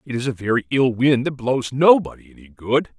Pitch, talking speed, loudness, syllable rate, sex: 125 Hz, 220 wpm, -19 LUFS, 5.4 syllables/s, male